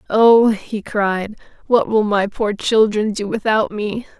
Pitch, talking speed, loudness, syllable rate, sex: 215 Hz, 155 wpm, -17 LUFS, 3.6 syllables/s, female